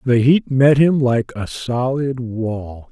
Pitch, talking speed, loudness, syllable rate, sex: 125 Hz, 165 wpm, -17 LUFS, 3.2 syllables/s, male